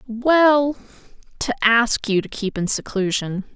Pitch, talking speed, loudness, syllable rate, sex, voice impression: 230 Hz, 120 wpm, -19 LUFS, 3.8 syllables/s, female, very feminine, slightly young, thin, very tensed, powerful, dark, hard, very clear, very fluent, cute, intellectual, very refreshing, sincere, calm, very friendly, very reassuring, unique, elegant, slightly wild, sweet, strict, intense, slightly sharp, slightly light